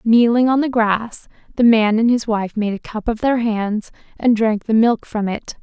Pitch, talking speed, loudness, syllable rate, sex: 225 Hz, 225 wpm, -17 LUFS, 4.5 syllables/s, female